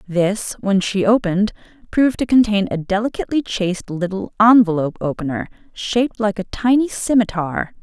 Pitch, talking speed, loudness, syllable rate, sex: 205 Hz, 140 wpm, -18 LUFS, 5.4 syllables/s, female